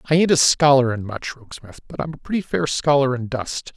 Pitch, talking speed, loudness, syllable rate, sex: 135 Hz, 240 wpm, -19 LUFS, 5.6 syllables/s, male